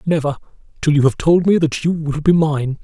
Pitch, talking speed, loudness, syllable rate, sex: 155 Hz, 235 wpm, -16 LUFS, 5.3 syllables/s, male